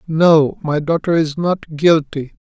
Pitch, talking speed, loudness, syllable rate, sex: 155 Hz, 150 wpm, -16 LUFS, 3.7 syllables/s, male